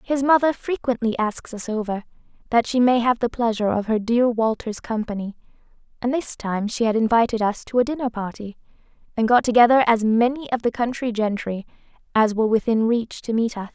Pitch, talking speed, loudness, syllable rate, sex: 230 Hz, 190 wpm, -21 LUFS, 5.6 syllables/s, female